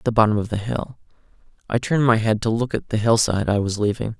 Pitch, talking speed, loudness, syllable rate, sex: 110 Hz, 255 wpm, -21 LUFS, 6.7 syllables/s, male